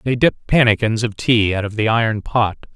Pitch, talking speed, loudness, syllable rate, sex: 110 Hz, 215 wpm, -17 LUFS, 5.6 syllables/s, male